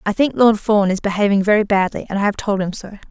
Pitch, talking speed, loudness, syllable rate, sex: 205 Hz, 270 wpm, -17 LUFS, 6.3 syllables/s, female